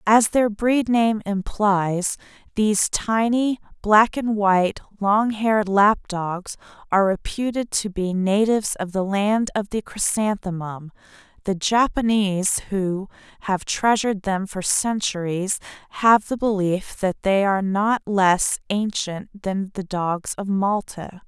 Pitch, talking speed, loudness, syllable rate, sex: 205 Hz, 135 wpm, -21 LUFS, 3.9 syllables/s, female